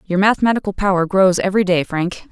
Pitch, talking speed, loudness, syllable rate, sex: 190 Hz, 180 wpm, -16 LUFS, 6.3 syllables/s, female